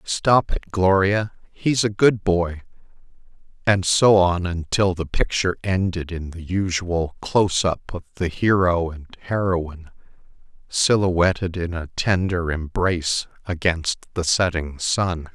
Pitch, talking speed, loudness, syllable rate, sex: 90 Hz, 125 wpm, -21 LUFS, 4.0 syllables/s, male